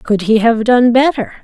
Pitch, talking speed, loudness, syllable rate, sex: 230 Hz, 210 wpm, -12 LUFS, 4.4 syllables/s, female